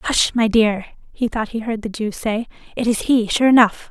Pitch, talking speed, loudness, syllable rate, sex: 225 Hz, 230 wpm, -18 LUFS, 4.9 syllables/s, female